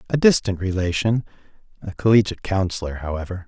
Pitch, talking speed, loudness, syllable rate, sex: 95 Hz, 105 wpm, -21 LUFS, 6.3 syllables/s, male